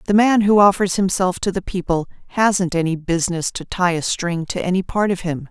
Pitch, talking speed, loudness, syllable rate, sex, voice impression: 185 Hz, 220 wpm, -19 LUFS, 5.4 syllables/s, female, feminine, adult-like, slightly bright, fluent, intellectual, calm, friendly, reassuring, elegant, kind